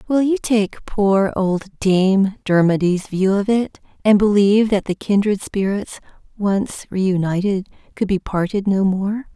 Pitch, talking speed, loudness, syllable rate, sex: 200 Hz, 150 wpm, -18 LUFS, 3.9 syllables/s, female